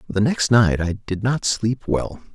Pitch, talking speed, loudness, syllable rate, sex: 110 Hz, 205 wpm, -20 LUFS, 3.8 syllables/s, male